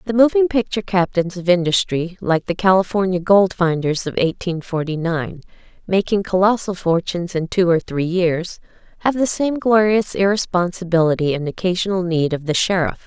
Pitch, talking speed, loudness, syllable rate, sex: 185 Hz, 155 wpm, -18 LUFS, 5.2 syllables/s, female